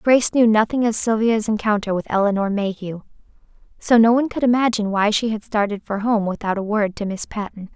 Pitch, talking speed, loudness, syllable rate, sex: 215 Hz, 200 wpm, -19 LUFS, 5.9 syllables/s, female